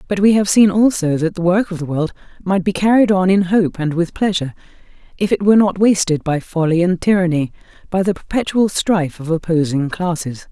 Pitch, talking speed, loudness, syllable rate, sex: 180 Hz, 205 wpm, -16 LUFS, 5.7 syllables/s, female